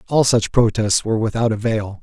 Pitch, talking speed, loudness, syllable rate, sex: 110 Hz, 180 wpm, -18 LUFS, 5.4 syllables/s, male